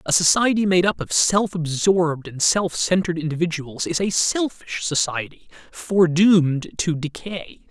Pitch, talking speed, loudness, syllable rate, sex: 170 Hz, 140 wpm, -20 LUFS, 4.7 syllables/s, male